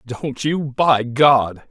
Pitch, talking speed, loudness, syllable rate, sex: 130 Hz, 140 wpm, -17 LUFS, 2.5 syllables/s, male